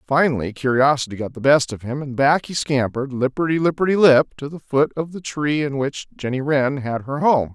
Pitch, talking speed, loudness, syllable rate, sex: 140 Hz, 215 wpm, -20 LUFS, 5.5 syllables/s, male